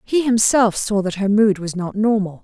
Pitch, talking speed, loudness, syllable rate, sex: 210 Hz, 220 wpm, -18 LUFS, 4.7 syllables/s, female